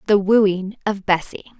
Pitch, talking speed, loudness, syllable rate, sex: 200 Hz, 150 wpm, -19 LUFS, 4.2 syllables/s, female